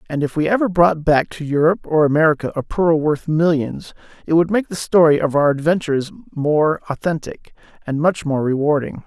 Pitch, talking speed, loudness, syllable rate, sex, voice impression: 155 Hz, 180 wpm, -18 LUFS, 5.4 syllables/s, male, masculine, adult-like, slightly muffled, refreshing, slightly sincere, friendly, kind